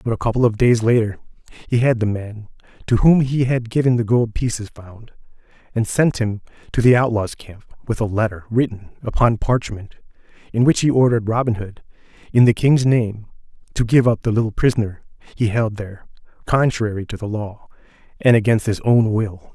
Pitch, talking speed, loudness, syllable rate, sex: 115 Hz, 185 wpm, -18 LUFS, 5.4 syllables/s, male